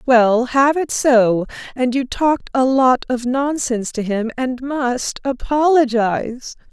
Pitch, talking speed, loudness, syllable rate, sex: 255 Hz, 145 wpm, -17 LUFS, 3.9 syllables/s, female